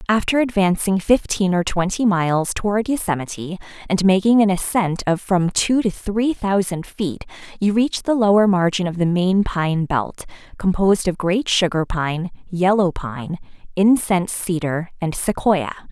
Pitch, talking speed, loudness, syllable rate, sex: 190 Hz, 150 wpm, -19 LUFS, 4.5 syllables/s, female